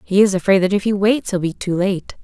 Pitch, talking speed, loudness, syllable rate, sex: 195 Hz, 295 wpm, -17 LUFS, 5.7 syllables/s, female